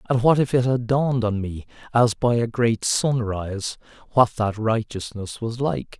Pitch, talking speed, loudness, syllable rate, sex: 115 Hz, 180 wpm, -22 LUFS, 4.4 syllables/s, male